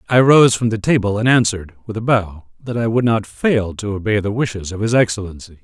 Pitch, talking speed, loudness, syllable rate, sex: 110 Hz, 235 wpm, -17 LUFS, 5.8 syllables/s, male